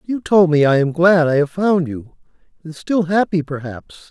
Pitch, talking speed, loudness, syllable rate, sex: 165 Hz, 205 wpm, -16 LUFS, 4.9 syllables/s, male